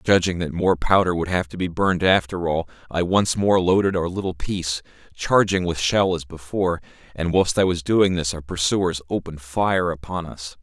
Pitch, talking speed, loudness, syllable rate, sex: 90 Hz, 200 wpm, -21 LUFS, 5.2 syllables/s, male